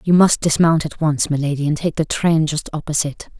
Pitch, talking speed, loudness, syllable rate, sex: 155 Hz, 210 wpm, -18 LUFS, 5.7 syllables/s, female